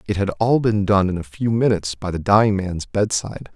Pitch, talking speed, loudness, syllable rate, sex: 100 Hz, 235 wpm, -19 LUFS, 5.5 syllables/s, male